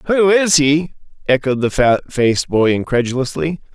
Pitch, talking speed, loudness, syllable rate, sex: 145 Hz, 145 wpm, -15 LUFS, 4.6 syllables/s, male